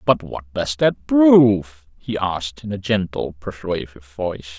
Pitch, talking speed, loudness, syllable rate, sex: 100 Hz, 155 wpm, -20 LUFS, 4.5 syllables/s, male